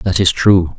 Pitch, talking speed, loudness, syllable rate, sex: 95 Hz, 230 wpm, -13 LUFS, 4.1 syllables/s, male